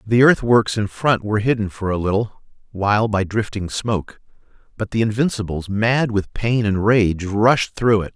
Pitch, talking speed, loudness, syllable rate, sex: 105 Hz, 175 wpm, -19 LUFS, 4.8 syllables/s, male